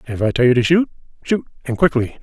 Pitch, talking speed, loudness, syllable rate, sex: 135 Hz, 215 wpm, -18 LUFS, 6.5 syllables/s, male